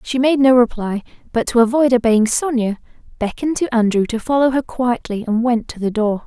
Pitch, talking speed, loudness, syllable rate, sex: 240 Hz, 200 wpm, -17 LUFS, 5.5 syllables/s, female